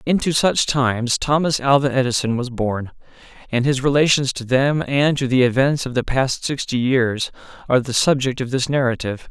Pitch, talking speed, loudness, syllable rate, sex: 130 Hz, 180 wpm, -19 LUFS, 5.2 syllables/s, male